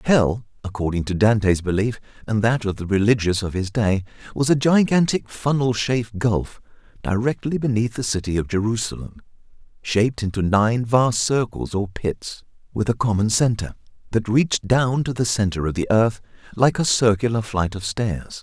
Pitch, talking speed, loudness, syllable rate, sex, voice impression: 110 Hz, 165 wpm, -21 LUFS, 5.0 syllables/s, male, very masculine, very adult-like, middle-aged, very thick, slightly tensed, slightly weak, bright, very soft, slightly muffled, very fluent, slightly raspy, cool, very intellectual, refreshing, very sincere, very calm, very mature, very friendly, very reassuring, very unique, elegant, slightly wild, very sweet, lively, very kind, modest